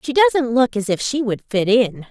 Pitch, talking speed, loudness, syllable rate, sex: 240 Hz, 255 wpm, -18 LUFS, 4.7 syllables/s, female